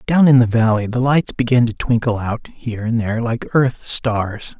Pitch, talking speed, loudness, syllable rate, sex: 120 Hz, 210 wpm, -17 LUFS, 4.8 syllables/s, male